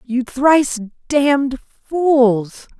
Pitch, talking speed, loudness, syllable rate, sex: 260 Hz, 85 wpm, -16 LUFS, 2.9 syllables/s, female